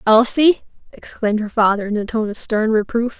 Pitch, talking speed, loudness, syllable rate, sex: 225 Hz, 190 wpm, -17 LUFS, 5.4 syllables/s, female